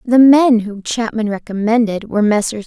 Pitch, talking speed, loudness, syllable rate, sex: 225 Hz, 160 wpm, -14 LUFS, 4.7 syllables/s, female